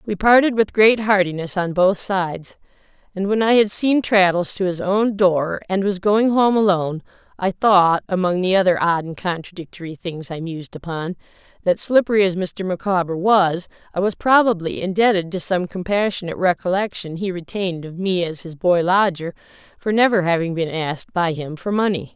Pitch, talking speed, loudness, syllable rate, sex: 185 Hz, 180 wpm, -19 LUFS, 5.2 syllables/s, female